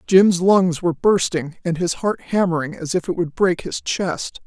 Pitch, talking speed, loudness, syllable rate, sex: 175 Hz, 200 wpm, -19 LUFS, 4.5 syllables/s, female